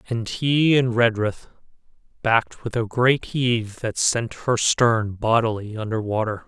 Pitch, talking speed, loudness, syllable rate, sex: 115 Hz, 150 wpm, -21 LUFS, 4.2 syllables/s, male